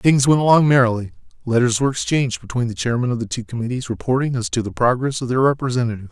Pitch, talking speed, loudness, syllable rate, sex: 125 Hz, 215 wpm, -19 LUFS, 7.2 syllables/s, male